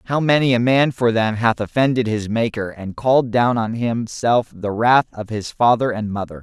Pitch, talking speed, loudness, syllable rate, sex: 115 Hz, 215 wpm, -18 LUFS, 4.9 syllables/s, male